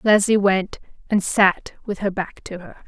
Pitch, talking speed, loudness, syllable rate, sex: 195 Hz, 190 wpm, -20 LUFS, 4.4 syllables/s, female